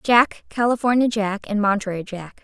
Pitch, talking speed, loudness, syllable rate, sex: 215 Hz, 150 wpm, -21 LUFS, 4.9 syllables/s, female